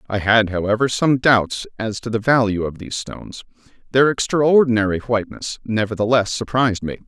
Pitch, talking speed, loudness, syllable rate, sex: 115 Hz, 155 wpm, -18 LUFS, 5.6 syllables/s, male